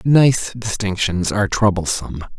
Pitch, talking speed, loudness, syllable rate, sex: 105 Hz, 100 wpm, -18 LUFS, 4.7 syllables/s, male